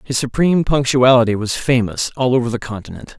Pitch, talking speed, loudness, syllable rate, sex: 125 Hz, 170 wpm, -16 LUFS, 5.9 syllables/s, male